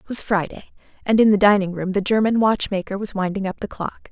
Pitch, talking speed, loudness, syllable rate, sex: 200 Hz, 235 wpm, -20 LUFS, 6.0 syllables/s, female